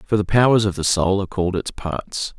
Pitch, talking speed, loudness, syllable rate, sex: 100 Hz, 250 wpm, -20 LUFS, 5.7 syllables/s, male